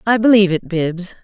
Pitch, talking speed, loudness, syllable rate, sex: 190 Hz, 195 wpm, -15 LUFS, 5.7 syllables/s, female